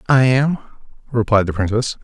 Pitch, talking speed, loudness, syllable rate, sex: 120 Hz, 145 wpm, -17 LUFS, 5.3 syllables/s, male